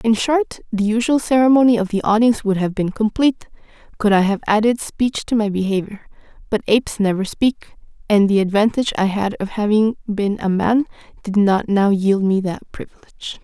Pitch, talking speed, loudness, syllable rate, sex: 215 Hz, 185 wpm, -18 LUFS, 5.3 syllables/s, female